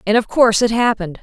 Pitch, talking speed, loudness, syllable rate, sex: 220 Hz, 245 wpm, -15 LUFS, 7.3 syllables/s, female